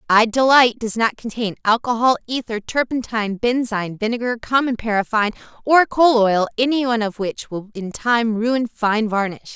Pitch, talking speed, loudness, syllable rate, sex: 230 Hz, 155 wpm, -19 LUFS, 5.0 syllables/s, female